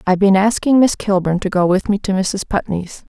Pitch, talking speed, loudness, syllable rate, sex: 195 Hz, 230 wpm, -16 LUFS, 5.4 syllables/s, female